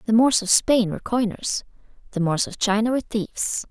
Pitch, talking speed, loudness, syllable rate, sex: 220 Hz, 195 wpm, -22 LUFS, 5.6 syllables/s, female